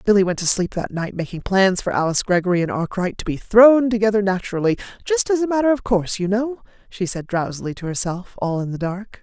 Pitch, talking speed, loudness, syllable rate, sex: 200 Hz, 220 wpm, -20 LUFS, 6.1 syllables/s, female